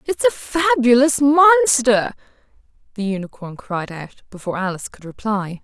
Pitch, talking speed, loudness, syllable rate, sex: 240 Hz, 130 wpm, -17 LUFS, 4.7 syllables/s, female